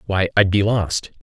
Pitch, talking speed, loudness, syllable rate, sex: 100 Hz, 195 wpm, -18 LUFS, 4.4 syllables/s, male